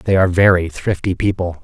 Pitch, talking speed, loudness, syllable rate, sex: 90 Hz, 185 wpm, -16 LUFS, 5.8 syllables/s, male